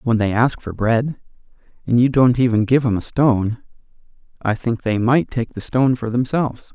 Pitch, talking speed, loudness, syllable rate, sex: 120 Hz, 195 wpm, -18 LUFS, 5.1 syllables/s, male